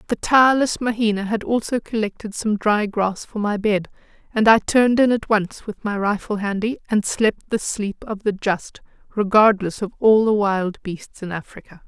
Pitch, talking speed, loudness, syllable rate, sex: 210 Hz, 185 wpm, -20 LUFS, 4.8 syllables/s, female